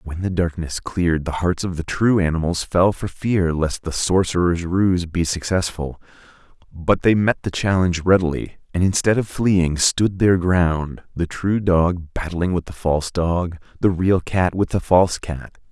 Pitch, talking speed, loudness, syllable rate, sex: 90 Hz, 180 wpm, -20 LUFS, 4.4 syllables/s, male